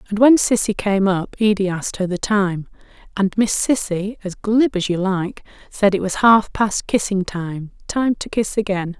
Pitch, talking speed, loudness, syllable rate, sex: 200 Hz, 195 wpm, -19 LUFS, 4.5 syllables/s, female